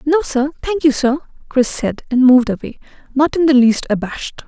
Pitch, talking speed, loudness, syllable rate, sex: 270 Hz, 200 wpm, -15 LUFS, 5.4 syllables/s, female